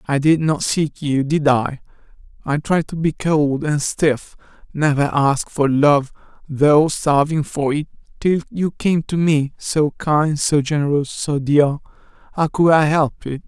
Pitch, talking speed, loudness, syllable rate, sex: 150 Hz, 165 wpm, -18 LUFS, 4.0 syllables/s, male